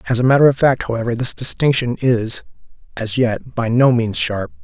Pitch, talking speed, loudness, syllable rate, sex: 120 Hz, 195 wpm, -17 LUFS, 5.3 syllables/s, male